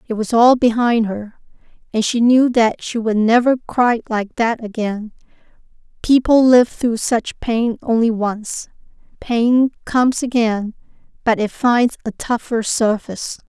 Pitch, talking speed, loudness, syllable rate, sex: 230 Hz, 140 wpm, -17 LUFS, 4.0 syllables/s, female